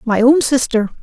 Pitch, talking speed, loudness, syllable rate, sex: 250 Hz, 175 wpm, -14 LUFS, 4.9 syllables/s, female